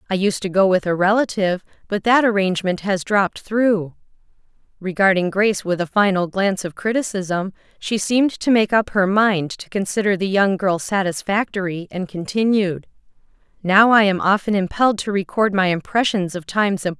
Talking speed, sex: 175 wpm, female